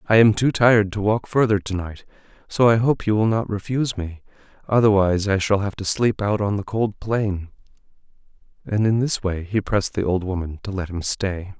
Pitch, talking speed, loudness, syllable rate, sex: 100 Hz, 210 wpm, -21 LUFS, 5.4 syllables/s, male